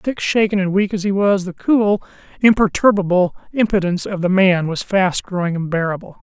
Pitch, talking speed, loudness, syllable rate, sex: 190 Hz, 170 wpm, -17 LUFS, 5.4 syllables/s, male